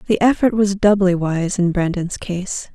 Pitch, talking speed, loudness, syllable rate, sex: 190 Hz, 175 wpm, -18 LUFS, 4.4 syllables/s, female